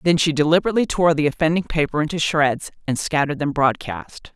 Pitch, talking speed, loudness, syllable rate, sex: 155 Hz, 180 wpm, -20 LUFS, 6.1 syllables/s, female